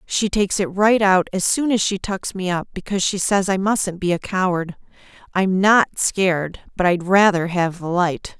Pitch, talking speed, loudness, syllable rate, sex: 190 Hz, 205 wpm, -19 LUFS, 4.7 syllables/s, female